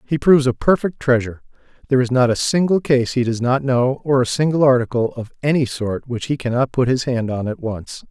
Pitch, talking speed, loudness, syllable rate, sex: 130 Hz, 230 wpm, -18 LUFS, 5.8 syllables/s, male